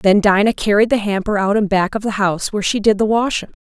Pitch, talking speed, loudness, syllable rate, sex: 205 Hz, 265 wpm, -16 LUFS, 6.3 syllables/s, female